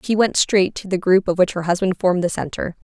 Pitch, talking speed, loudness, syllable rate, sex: 185 Hz, 270 wpm, -19 LUFS, 5.9 syllables/s, female